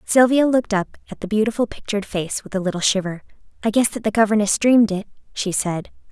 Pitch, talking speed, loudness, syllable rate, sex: 210 Hz, 205 wpm, -20 LUFS, 6.5 syllables/s, female